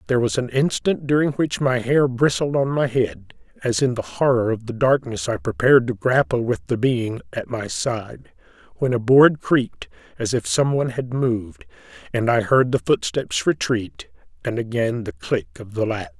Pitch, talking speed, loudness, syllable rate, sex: 125 Hz, 190 wpm, -21 LUFS, 4.9 syllables/s, male